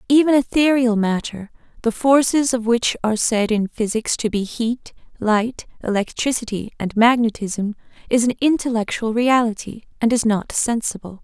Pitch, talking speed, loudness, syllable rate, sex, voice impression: 230 Hz, 140 wpm, -19 LUFS, 4.8 syllables/s, female, very feminine, young, slightly adult-like, very thin, slightly relaxed, very weak, slightly dark, slightly hard, clear, fluent, slightly raspy, very cute, intellectual, refreshing, sincere, very calm, reassuring, very unique, elegant, sweet, strict, intense